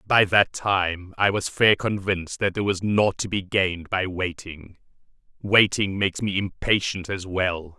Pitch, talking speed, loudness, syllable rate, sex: 95 Hz, 170 wpm, -23 LUFS, 4.4 syllables/s, male